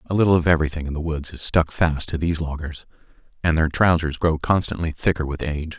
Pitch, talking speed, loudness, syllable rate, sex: 80 Hz, 220 wpm, -22 LUFS, 6.3 syllables/s, male